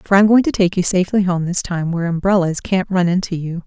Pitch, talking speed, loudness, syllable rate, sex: 185 Hz, 260 wpm, -17 LUFS, 6.2 syllables/s, female